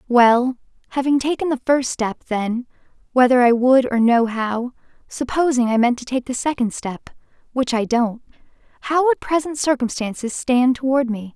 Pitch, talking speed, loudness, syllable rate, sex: 250 Hz, 155 wpm, -19 LUFS, 4.7 syllables/s, female